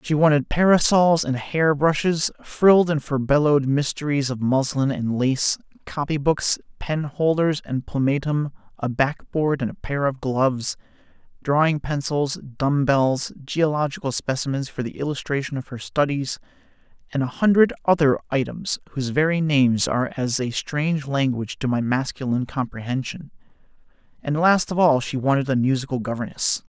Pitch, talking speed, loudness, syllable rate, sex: 140 Hz, 140 wpm, -22 LUFS, 5.0 syllables/s, male